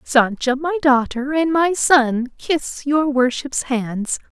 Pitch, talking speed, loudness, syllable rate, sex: 275 Hz, 135 wpm, -18 LUFS, 3.3 syllables/s, female